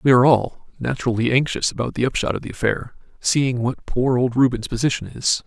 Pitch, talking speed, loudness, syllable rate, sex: 125 Hz, 200 wpm, -20 LUFS, 5.7 syllables/s, male